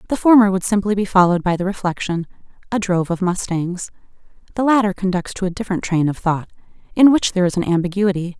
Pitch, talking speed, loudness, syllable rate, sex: 190 Hz, 200 wpm, -18 LUFS, 6.6 syllables/s, female